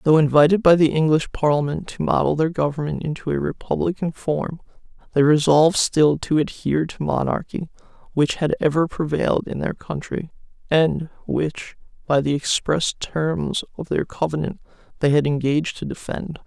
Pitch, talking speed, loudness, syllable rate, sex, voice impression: 155 Hz, 155 wpm, -21 LUFS, 5.1 syllables/s, male, masculine, very adult-like, middle-aged, thick, very relaxed, weak, dark, very soft, very muffled, slightly fluent, slightly cool, slightly intellectual, very sincere, very calm, slightly mature, slightly friendly, very unique, elegant, sweet, very kind, very modest